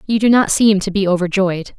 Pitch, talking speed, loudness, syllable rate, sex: 195 Hz, 235 wpm, -15 LUFS, 5.5 syllables/s, female